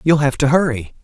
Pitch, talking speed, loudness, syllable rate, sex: 145 Hz, 235 wpm, -16 LUFS, 5.8 syllables/s, male